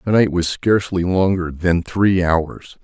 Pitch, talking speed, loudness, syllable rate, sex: 90 Hz, 170 wpm, -18 LUFS, 4.1 syllables/s, male